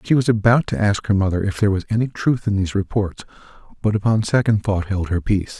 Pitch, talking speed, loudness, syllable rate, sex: 105 Hz, 235 wpm, -19 LUFS, 6.4 syllables/s, male